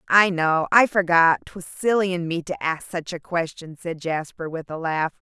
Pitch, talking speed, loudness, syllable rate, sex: 170 Hz, 180 wpm, -22 LUFS, 4.9 syllables/s, female